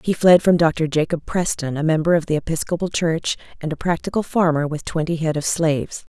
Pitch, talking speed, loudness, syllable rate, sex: 160 Hz, 205 wpm, -20 LUFS, 5.6 syllables/s, female